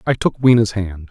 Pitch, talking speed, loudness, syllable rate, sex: 105 Hz, 215 wpm, -16 LUFS, 5.1 syllables/s, male